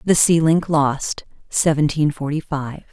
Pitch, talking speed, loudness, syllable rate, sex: 150 Hz, 145 wpm, -19 LUFS, 3.9 syllables/s, female